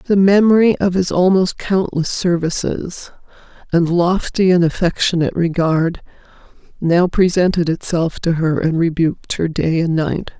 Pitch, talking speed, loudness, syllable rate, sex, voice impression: 175 Hz, 135 wpm, -16 LUFS, 4.5 syllables/s, female, slightly feminine, very adult-like, slightly dark, slightly raspy, very calm, slightly unique, very elegant